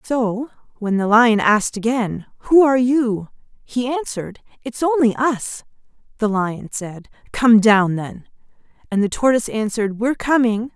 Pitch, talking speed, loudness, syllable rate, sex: 230 Hz, 145 wpm, -18 LUFS, 4.7 syllables/s, female